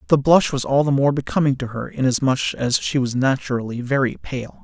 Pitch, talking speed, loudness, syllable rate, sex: 135 Hz, 205 wpm, -20 LUFS, 5.4 syllables/s, male